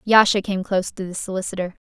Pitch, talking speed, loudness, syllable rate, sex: 195 Hz, 190 wpm, -21 LUFS, 6.5 syllables/s, female